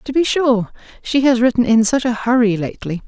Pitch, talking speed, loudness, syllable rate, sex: 240 Hz, 215 wpm, -16 LUFS, 5.6 syllables/s, female